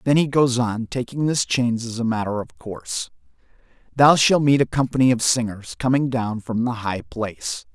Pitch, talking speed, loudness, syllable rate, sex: 120 Hz, 195 wpm, -21 LUFS, 5.1 syllables/s, male